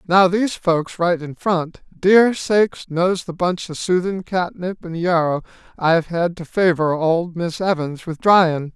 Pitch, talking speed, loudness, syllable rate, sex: 175 Hz, 170 wpm, -19 LUFS, 4.2 syllables/s, male